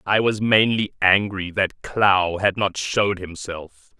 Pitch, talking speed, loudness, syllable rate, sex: 95 Hz, 150 wpm, -20 LUFS, 3.8 syllables/s, male